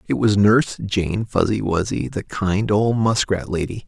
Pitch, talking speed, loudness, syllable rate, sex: 105 Hz, 170 wpm, -20 LUFS, 4.3 syllables/s, male